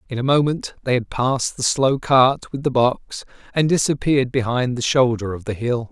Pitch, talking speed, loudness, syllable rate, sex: 130 Hz, 205 wpm, -19 LUFS, 5.0 syllables/s, male